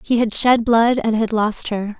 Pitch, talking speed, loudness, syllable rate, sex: 225 Hz, 240 wpm, -17 LUFS, 4.2 syllables/s, female